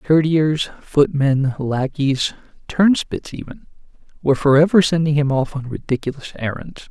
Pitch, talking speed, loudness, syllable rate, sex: 145 Hz, 115 wpm, -18 LUFS, 4.7 syllables/s, male